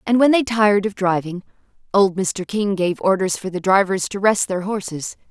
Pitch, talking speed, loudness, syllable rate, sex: 195 Hz, 205 wpm, -19 LUFS, 5.0 syllables/s, female